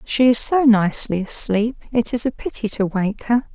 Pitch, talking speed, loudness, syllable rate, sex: 225 Hz, 205 wpm, -19 LUFS, 4.9 syllables/s, female